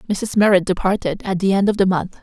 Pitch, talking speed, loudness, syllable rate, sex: 195 Hz, 245 wpm, -18 LUFS, 6.0 syllables/s, female